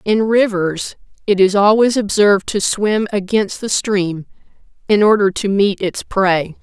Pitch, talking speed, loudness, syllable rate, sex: 200 Hz, 155 wpm, -15 LUFS, 4.2 syllables/s, female